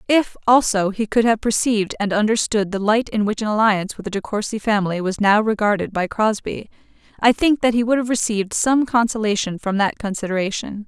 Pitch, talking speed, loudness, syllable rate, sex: 215 Hz, 200 wpm, -19 LUFS, 5.8 syllables/s, female